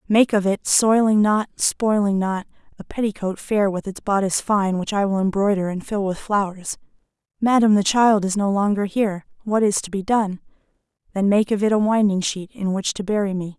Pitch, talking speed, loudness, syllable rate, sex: 200 Hz, 195 wpm, -20 LUFS, 5.3 syllables/s, female